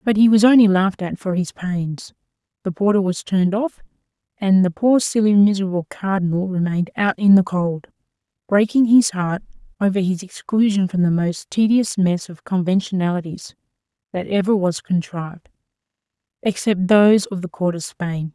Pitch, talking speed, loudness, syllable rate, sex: 190 Hz, 155 wpm, -19 LUFS, 5.2 syllables/s, female